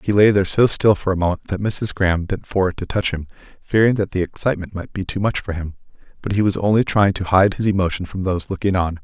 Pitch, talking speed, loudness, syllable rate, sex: 95 Hz, 260 wpm, -19 LUFS, 6.4 syllables/s, male